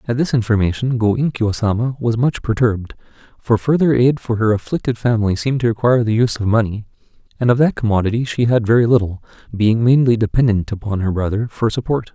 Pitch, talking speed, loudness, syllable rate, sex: 115 Hz, 195 wpm, -17 LUFS, 6.3 syllables/s, male